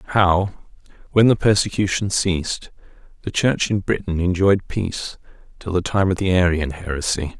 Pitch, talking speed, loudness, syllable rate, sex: 95 Hz, 145 wpm, -20 LUFS, 4.7 syllables/s, male